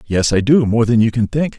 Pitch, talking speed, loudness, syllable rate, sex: 115 Hz, 305 wpm, -15 LUFS, 5.4 syllables/s, male